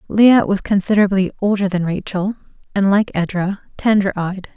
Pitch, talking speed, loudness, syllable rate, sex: 195 Hz, 145 wpm, -17 LUFS, 5.2 syllables/s, female